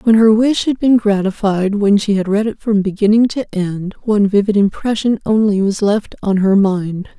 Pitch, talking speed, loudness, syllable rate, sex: 205 Hz, 200 wpm, -15 LUFS, 4.9 syllables/s, female